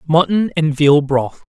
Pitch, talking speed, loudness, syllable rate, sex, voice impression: 155 Hz, 160 wpm, -15 LUFS, 3.8 syllables/s, male, masculine, slightly young, adult-like, slightly thick, slightly tensed, slightly weak, slightly dark, slightly hard, slightly clear, slightly fluent, cool, intellectual, very refreshing, sincere, calm, friendly, reassuring, slightly wild, slightly lively, kind, slightly modest